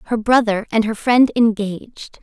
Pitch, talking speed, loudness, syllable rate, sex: 220 Hz, 160 wpm, -17 LUFS, 4.3 syllables/s, female